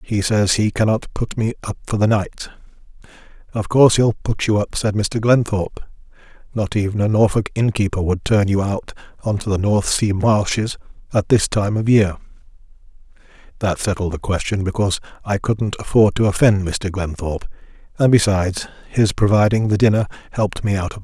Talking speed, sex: 180 wpm, male